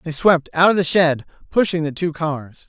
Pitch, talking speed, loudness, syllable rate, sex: 160 Hz, 225 wpm, -18 LUFS, 4.9 syllables/s, male